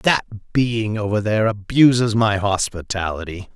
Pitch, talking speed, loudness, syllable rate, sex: 105 Hz, 120 wpm, -19 LUFS, 4.7 syllables/s, male